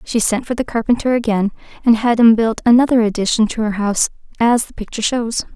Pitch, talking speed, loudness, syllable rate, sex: 225 Hz, 205 wpm, -16 LUFS, 6.2 syllables/s, female